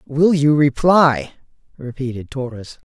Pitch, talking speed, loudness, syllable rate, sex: 140 Hz, 105 wpm, -17 LUFS, 4.0 syllables/s, male